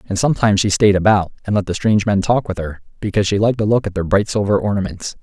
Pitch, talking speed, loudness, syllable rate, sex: 100 Hz, 265 wpm, -17 LUFS, 7.2 syllables/s, male